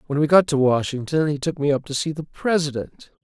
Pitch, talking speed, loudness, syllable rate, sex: 145 Hz, 240 wpm, -21 LUFS, 5.7 syllables/s, male